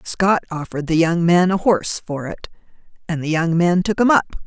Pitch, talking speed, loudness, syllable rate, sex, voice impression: 175 Hz, 215 wpm, -18 LUFS, 5.5 syllables/s, female, feminine, very adult-like, slightly halting, slightly intellectual, slightly calm, elegant